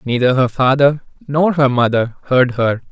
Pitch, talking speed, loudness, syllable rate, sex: 130 Hz, 165 wpm, -15 LUFS, 4.6 syllables/s, male